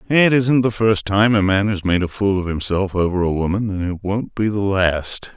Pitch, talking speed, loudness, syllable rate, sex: 100 Hz, 245 wpm, -18 LUFS, 4.9 syllables/s, male